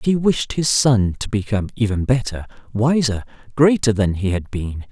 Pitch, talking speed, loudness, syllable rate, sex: 115 Hz, 185 wpm, -19 LUFS, 5.0 syllables/s, male